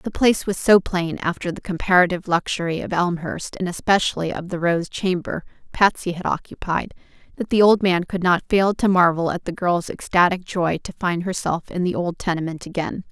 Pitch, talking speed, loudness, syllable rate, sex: 180 Hz, 190 wpm, -21 LUFS, 5.3 syllables/s, female